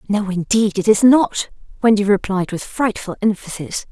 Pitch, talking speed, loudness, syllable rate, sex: 205 Hz, 155 wpm, -17 LUFS, 4.8 syllables/s, female